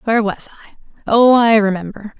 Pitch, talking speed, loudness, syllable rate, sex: 215 Hz, 165 wpm, -14 LUFS, 6.0 syllables/s, female